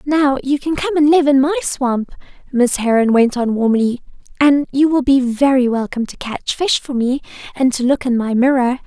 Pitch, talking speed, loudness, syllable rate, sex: 265 Hz, 210 wpm, -16 LUFS, 5.0 syllables/s, female